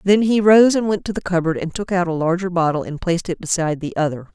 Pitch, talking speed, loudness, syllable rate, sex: 180 Hz, 275 wpm, -18 LUFS, 6.4 syllables/s, female